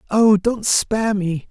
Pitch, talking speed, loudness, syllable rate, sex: 205 Hz, 160 wpm, -18 LUFS, 3.9 syllables/s, male